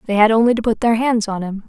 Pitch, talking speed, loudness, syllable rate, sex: 220 Hz, 320 wpm, -16 LUFS, 6.6 syllables/s, female